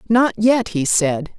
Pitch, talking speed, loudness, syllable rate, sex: 200 Hz, 175 wpm, -17 LUFS, 3.4 syllables/s, female